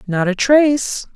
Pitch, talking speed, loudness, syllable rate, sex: 235 Hz, 155 wpm, -15 LUFS, 4.1 syllables/s, female